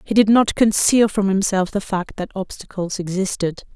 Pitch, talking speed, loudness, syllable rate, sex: 195 Hz, 175 wpm, -19 LUFS, 4.8 syllables/s, female